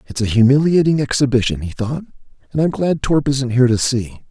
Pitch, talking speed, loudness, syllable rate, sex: 130 Hz, 195 wpm, -17 LUFS, 5.9 syllables/s, male